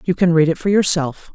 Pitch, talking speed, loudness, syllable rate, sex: 170 Hz, 270 wpm, -16 LUFS, 5.7 syllables/s, female